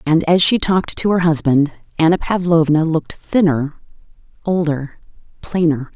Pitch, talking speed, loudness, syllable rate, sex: 160 Hz, 130 wpm, -16 LUFS, 4.9 syllables/s, female